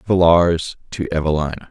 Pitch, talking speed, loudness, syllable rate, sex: 85 Hz, 105 wpm, -17 LUFS, 4.7 syllables/s, male